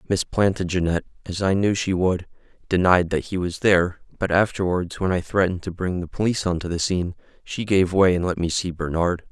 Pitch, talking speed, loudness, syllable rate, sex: 90 Hz, 200 wpm, -22 LUFS, 5.7 syllables/s, male